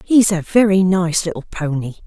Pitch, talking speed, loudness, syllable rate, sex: 180 Hz, 175 wpm, -17 LUFS, 4.7 syllables/s, female